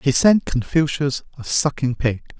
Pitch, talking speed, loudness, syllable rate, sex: 140 Hz, 150 wpm, -20 LUFS, 4.4 syllables/s, male